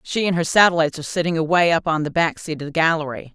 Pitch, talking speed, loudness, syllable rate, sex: 165 Hz, 270 wpm, -19 LUFS, 7.1 syllables/s, female